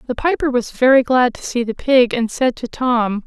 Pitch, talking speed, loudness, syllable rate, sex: 245 Hz, 240 wpm, -17 LUFS, 4.8 syllables/s, female